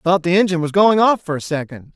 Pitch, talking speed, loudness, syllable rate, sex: 175 Hz, 275 wpm, -16 LUFS, 6.3 syllables/s, male